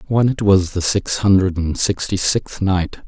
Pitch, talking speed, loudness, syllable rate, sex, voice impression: 95 Hz, 195 wpm, -17 LUFS, 4.3 syllables/s, male, masculine, adult-like, slightly dark, calm, slightly friendly, kind